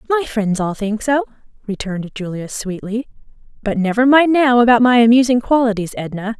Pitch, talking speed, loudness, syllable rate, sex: 230 Hz, 160 wpm, -16 LUFS, 5.7 syllables/s, female